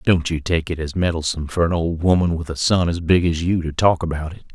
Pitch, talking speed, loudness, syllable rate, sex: 85 Hz, 275 wpm, -20 LUFS, 5.9 syllables/s, male